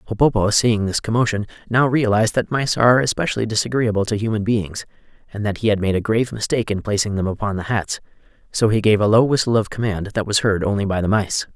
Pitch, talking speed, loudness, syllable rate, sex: 110 Hz, 225 wpm, -19 LUFS, 6.4 syllables/s, male